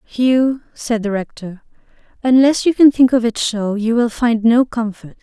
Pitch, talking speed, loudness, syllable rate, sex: 235 Hz, 185 wpm, -15 LUFS, 4.3 syllables/s, female